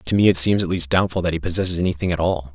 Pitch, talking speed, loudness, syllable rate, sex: 85 Hz, 305 wpm, -19 LUFS, 7.4 syllables/s, male